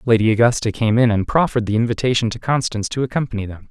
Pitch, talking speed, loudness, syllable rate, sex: 115 Hz, 210 wpm, -18 LUFS, 7.2 syllables/s, male